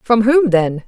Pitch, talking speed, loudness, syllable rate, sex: 220 Hz, 205 wpm, -14 LUFS, 3.9 syllables/s, female